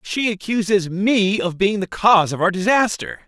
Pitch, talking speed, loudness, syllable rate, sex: 200 Hz, 185 wpm, -18 LUFS, 4.8 syllables/s, male